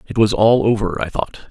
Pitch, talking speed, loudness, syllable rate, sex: 105 Hz, 240 wpm, -17 LUFS, 5.2 syllables/s, male